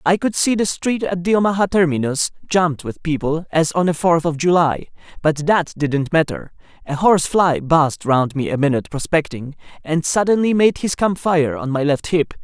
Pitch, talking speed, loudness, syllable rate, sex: 165 Hz, 200 wpm, -18 LUFS, 5.2 syllables/s, male